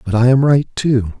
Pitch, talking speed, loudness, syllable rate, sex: 125 Hz, 250 wpm, -14 LUFS, 5.3 syllables/s, male